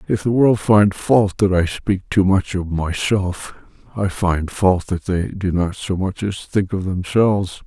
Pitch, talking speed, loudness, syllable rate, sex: 95 Hz, 195 wpm, -18 LUFS, 4.0 syllables/s, male